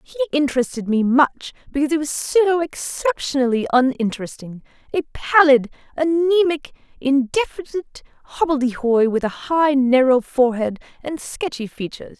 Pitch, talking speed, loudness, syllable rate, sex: 280 Hz, 110 wpm, -19 LUFS, 5.1 syllables/s, female